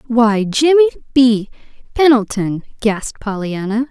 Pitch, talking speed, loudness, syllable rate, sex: 235 Hz, 75 wpm, -15 LUFS, 4.3 syllables/s, female